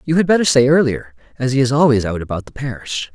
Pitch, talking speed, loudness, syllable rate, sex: 130 Hz, 250 wpm, -16 LUFS, 6.3 syllables/s, male